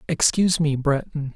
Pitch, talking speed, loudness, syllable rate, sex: 150 Hz, 135 wpm, -21 LUFS, 5.0 syllables/s, male